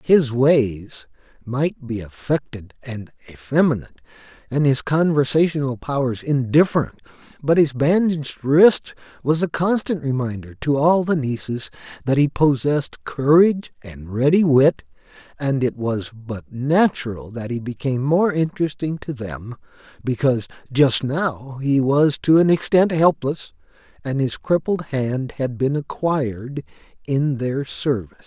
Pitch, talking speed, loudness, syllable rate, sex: 140 Hz, 130 wpm, -20 LUFS, 4.4 syllables/s, male